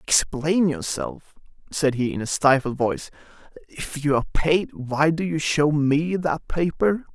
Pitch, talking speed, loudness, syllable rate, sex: 155 Hz, 150 wpm, -22 LUFS, 4.2 syllables/s, male